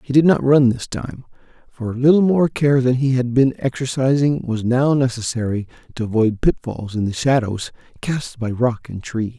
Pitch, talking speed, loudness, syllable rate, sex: 125 Hz, 190 wpm, -19 LUFS, 4.9 syllables/s, male